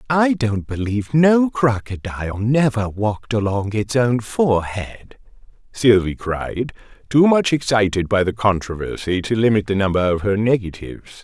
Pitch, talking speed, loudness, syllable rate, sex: 110 Hz, 140 wpm, -19 LUFS, 4.7 syllables/s, male